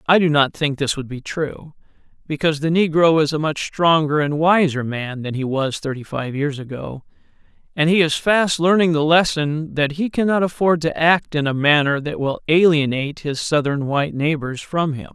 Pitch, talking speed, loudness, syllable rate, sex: 155 Hz, 200 wpm, -19 LUFS, 5.0 syllables/s, male